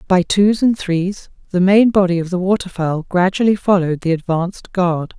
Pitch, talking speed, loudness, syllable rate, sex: 185 Hz, 175 wpm, -16 LUFS, 5.1 syllables/s, female